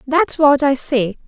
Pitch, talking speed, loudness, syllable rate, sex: 275 Hz, 190 wpm, -15 LUFS, 3.8 syllables/s, female